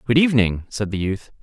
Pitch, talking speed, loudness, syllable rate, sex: 115 Hz, 210 wpm, -20 LUFS, 5.8 syllables/s, male